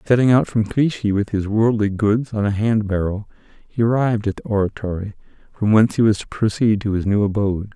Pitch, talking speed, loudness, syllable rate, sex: 105 Hz, 210 wpm, -19 LUFS, 5.8 syllables/s, male